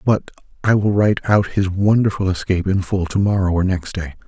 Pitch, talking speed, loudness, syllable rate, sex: 95 Hz, 210 wpm, -18 LUFS, 5.6 syllables/s, male